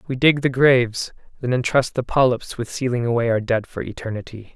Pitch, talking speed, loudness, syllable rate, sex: 125 Hz, 200 wpm, -20 LUFS, 5.6 syllables/s, male